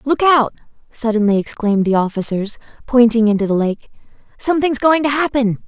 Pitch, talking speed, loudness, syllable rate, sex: 240 Hz, 150 wpm, -16 LUFS, 5.7 syllables/s, female